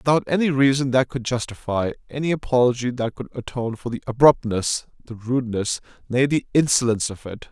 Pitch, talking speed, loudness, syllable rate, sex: 125 Hz, 170 wpm, -22 LUFS, 5.9 syllables/s, male